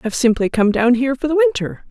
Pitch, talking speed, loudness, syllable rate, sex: 245 Hz, 250 wpm, -16 LUFS, 6.7 syllables/s, female